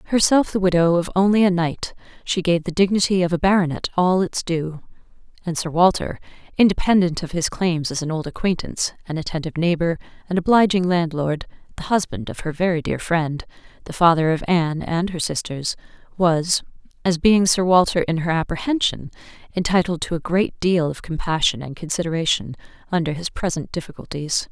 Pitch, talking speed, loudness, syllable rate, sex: 170 Hz, 170 wpm, -20 LUFS, 5.6 syllables/s, female